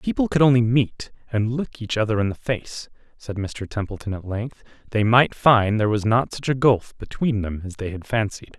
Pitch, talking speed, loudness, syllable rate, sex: 110 Hz, 225 wpm, -22 LUFS, 5.3 syllables/s, male